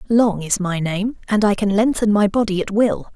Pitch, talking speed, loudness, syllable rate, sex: 205 Hz, 230 wpm, -18 LUFS, 5.0 syllables/s, female